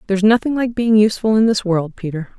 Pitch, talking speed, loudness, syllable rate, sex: 210 Hz, 225 wpm, -16 LUFS, 6.5 syllables/s, female